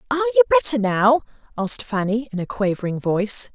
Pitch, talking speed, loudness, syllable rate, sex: 235 Hz, 170 wpm, -20 LUFS, 7.1 syllables/s, female